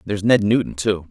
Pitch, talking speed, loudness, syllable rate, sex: 100 Hz, 220 wpm, -18 LUFS, 6.1 syllables/s, male